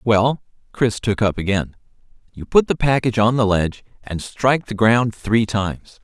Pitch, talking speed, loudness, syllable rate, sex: 110 Hz, 180 wpm, -19 LUFS, 4.9 syllables/s, male